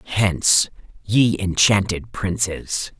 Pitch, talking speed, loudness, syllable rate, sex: 100 Hz, 80 wpm, -19 LUFS, 3.2 syllables/s, female